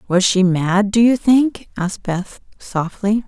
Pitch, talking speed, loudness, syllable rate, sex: 200 Hz, 165 wpm, -17 LUFS, 3.9 syllables/s, female